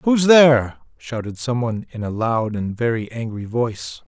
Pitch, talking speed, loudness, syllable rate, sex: 120 Hz, 175 wpm, -19 LUFS, 4.8 syllables/s, male